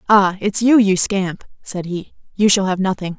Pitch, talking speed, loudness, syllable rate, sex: 195 Hz, 205 wpm, -17 LUFS, 4.6 syllables/s, female